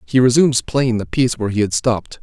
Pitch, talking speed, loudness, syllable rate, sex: 120 Hz, 245 wpm, -17 LUFS, 6.6 syllables/s, male